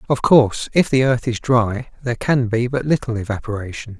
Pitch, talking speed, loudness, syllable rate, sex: 120 Hz, 195 wpm, -18 LUFS, 5.4 syllables/s, male